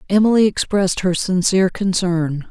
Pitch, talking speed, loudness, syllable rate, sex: 185 Hz, 120 wpm, -17 LUFS, 5.2 syllables/s, female